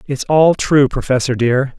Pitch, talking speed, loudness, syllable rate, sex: 135 Hz, 170 wpm, -14 LUFS, 4.3 syllables/s, male